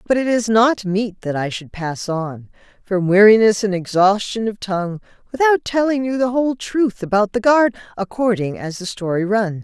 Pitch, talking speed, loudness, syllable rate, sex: 210 Hz, 185 wpm, -18 LUFS, 4.9 syllables/s, female